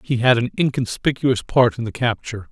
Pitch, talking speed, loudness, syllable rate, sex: 120 Hz, 190 wpm, -19 LUFS, 5.6 syllables/s, male